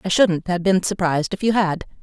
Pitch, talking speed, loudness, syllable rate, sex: 185 Hz, 235 wpm, -20 LUFS, 5.6 syllables/s, female